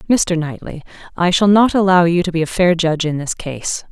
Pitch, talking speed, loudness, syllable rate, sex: 175 Hz, 230 wpm, -16 LUFS, 5.4 syllables/s, female